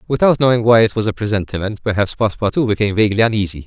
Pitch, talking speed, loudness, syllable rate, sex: 110 Hz, 195 wpm, -16 LUFS, 7.7 syllables/s, male